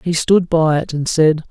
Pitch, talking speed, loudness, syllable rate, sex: 160 Hz, 240 wpm, -15 LUFS, 4.3 syllables/s, male